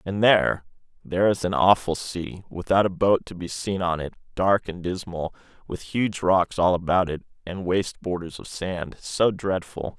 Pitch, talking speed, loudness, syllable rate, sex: 90 Hz, 185 wpm, -24 LUFS, 4.7 syllables/s, male